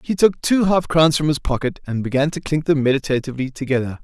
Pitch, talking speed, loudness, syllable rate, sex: 145 Hz, 225 wpm, -19 LUFS, 6.2 syllables/s, male